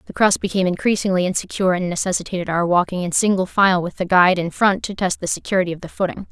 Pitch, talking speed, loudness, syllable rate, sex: 185 Hz, 230 wpm, -19 LUFS, 7.0 syllables/s, female